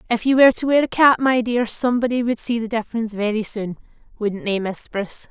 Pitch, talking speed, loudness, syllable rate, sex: 230 Hz, 215 wpm, -19 LUFS, 6.2 syllables/s, female